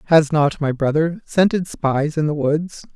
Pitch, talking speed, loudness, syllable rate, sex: 155 Hz, 185 wpm, -19 LUFS, 4.2 syllables/s, female